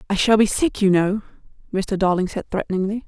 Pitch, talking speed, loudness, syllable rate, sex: 200 Hz, 195 wpm, -20 LUFS, 6.0 syllables/s, female